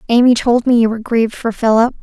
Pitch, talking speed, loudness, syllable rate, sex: 235 Hz, 235 wpm, -14 LUFS, 6.7 syllables/s, female